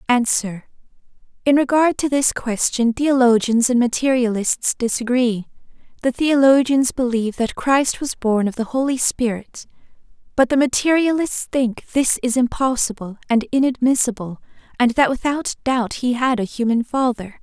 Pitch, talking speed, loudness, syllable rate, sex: 250 Hz, 130 wpm, -18 LUFS, 4.7 syllables/s, female